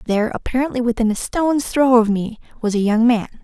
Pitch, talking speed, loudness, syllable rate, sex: 235 Hz, 175 wpm, -18 LUFS, 6.3 syllables/s, female